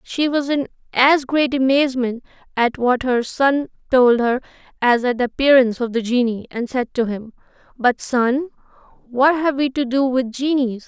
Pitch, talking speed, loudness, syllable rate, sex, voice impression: 255 Hz, 175 wpm, -18 LUFS, 4.7 syllables/s, female, very feminine, slightly gender-neutral, very young, very thin, tensed, slightly weak, very bright, hard, very clear, slightly halting, very cute, slightly intellectual, very refreshing, sincere, slightly calm, friendly, slightly reassuring, very unique, slightly wild, slightly sweet, lively, slightly strict, slightly intense, slightly sharp, very light